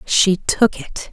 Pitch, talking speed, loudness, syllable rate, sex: 200 Hz, 160 wpm, -17 LUFS, 3.2 syllables/s, female